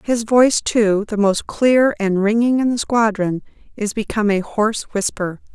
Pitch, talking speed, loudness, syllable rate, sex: 215 Hz, 175 wpm, -18 LUFS, 4.7 syllables/s, female